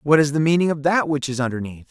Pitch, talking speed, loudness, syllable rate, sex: 145 Hz, 285 wpm, -20 LUFS, 6.4 syllables/s, male